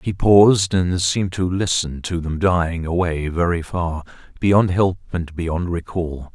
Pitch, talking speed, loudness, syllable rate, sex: 90 Hz, 150 wpm, -19 LUFS, 4.2 syllables/s, male